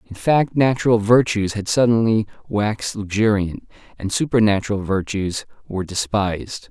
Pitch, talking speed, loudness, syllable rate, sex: 105 Hz, 115 wpm, -19 LUFS, 4.9 syllables/s, male